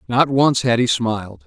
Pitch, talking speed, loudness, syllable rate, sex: 120 Hz, 205 wpm, -17 LUFS, 4.7 syllables/s, male